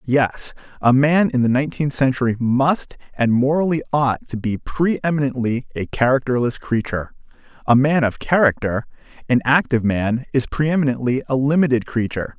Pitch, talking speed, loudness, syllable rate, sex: 130 Hz, 150 wpm, -19 LUFS, 5.4 syllables/s, male